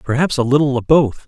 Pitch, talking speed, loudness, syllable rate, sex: 135 Hz, 235 wpm, -15 LUFS, 6.0 syllables/s, male